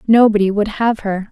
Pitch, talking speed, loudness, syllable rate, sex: 210 Hz, 185 wpm, -15 LUFS, 5.1 syllables/s, female